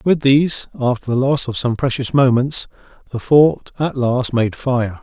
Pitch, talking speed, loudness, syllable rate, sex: 130 Hz, 180 wpm, -16 LUFS, 4.4 syllables/s, male